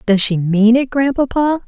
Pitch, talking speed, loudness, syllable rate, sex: 240 Hz, 180 wpm, -14 LUFS, 4.6 syllables/s, female